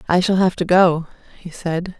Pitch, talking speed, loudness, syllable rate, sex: 175 Hz, 210 wpm, -18 LUFS, 4.6 syllables/s, female